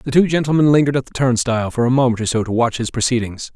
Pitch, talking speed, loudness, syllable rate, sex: 125 Hz, 270 wpm, -17 LUFS, 7.1 syllables/s, male